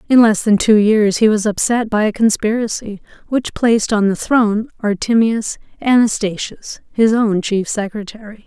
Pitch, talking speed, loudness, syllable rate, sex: 215 Hz, 155 wpm, -15 LUFS, 4.8 syllables/s, female